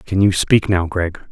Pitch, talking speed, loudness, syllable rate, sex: 90 Hz, 230 wpm, -17 LUFS, 3.9 syllables/s, male